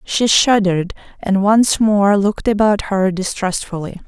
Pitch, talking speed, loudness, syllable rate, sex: 200 Hz, 130 wpm, -15 LUFS, 4.4 syllables/s, female